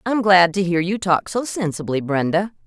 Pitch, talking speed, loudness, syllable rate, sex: 185 Hz, 200 wpm, -19 LUFS, 5.0 syllables/s, female